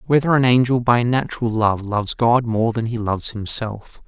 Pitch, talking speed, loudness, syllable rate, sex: 115 Hz, 190 wpm, -19 LUFS, 5.1 syllables/s, male